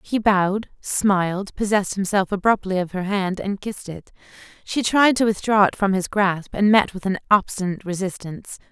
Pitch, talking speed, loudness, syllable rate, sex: 195 Hz, 180 wpm, -21 LUFS, 5.3 syllables/s, female